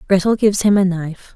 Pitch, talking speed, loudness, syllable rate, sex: 190 Hz, 220 wpm, -16 LUFS, 6.8 syllables/s, female